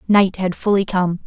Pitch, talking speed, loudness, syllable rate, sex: 190 Hz, 190 wpm, -18 LUFS, 4.7 syllables/s, female